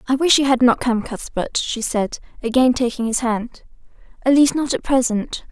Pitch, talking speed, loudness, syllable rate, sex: 245 Hz, 195 wpm, -19 LUFS, 4.9 syllables/s, female